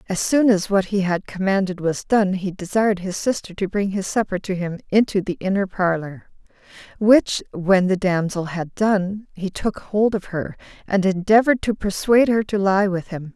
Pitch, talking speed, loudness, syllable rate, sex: 195 Hz, 195 wpm, -20 LUFS, 4.9 syllables/s, female